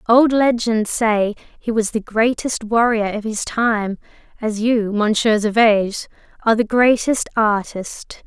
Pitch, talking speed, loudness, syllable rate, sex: 220 Hz, 140 wpm, -18 LUFS, 4.0 syllables/s, female